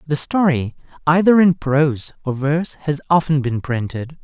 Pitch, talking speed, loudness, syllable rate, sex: 150 Hz, 155 wpm, -18 LUFS, 4.7 syllables/s, male